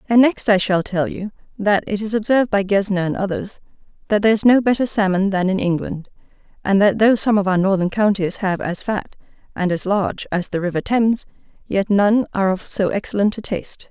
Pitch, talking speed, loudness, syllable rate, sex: 200 Hz, 210 wpm, -18 LUFS, 5.7 syllables/s, female